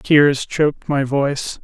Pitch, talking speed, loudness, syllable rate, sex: 140 Hz, 145 wpm, -18 LUFS, 3.8 syllables/s, male